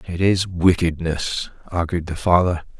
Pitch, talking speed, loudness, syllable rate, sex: 85 Hz, 130 wpm, -20 LUFS, 4.3 syllables/s, male